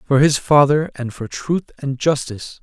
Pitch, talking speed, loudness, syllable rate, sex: 135 Hz, 185 wpm, -18 LUFS, 4.7 syllables/s, male